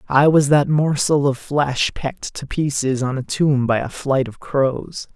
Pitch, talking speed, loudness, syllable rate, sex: 140 Hz, 200 wpm, -19 LUFS, 4.1 syllables/s, male